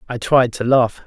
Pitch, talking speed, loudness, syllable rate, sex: 125 Hz, 225 wpm, -16 LUFS, 4.7 syllables/s, male